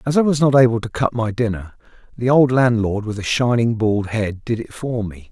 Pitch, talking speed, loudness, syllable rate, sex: 115 Hz, 235 wpm, -18 LUFS, 5.2 syllables/s, male